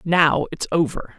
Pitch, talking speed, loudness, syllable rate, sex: 160 Hz, 150 wpm, -20 LUFS, 4.0 syllables/s, female